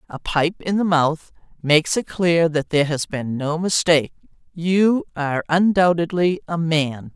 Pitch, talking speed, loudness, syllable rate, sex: 165 Hz, 150 wpm, -19 LUFS, 4.5 syllables/s, female